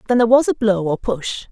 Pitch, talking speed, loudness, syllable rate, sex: 220 Hz, 275 wpm, -17 LUFS, 6.1 syllables/s, female